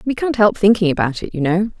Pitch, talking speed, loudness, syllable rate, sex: 195 Hz, 265 wpm, -16 LUFS, 6.1 syllables/s, female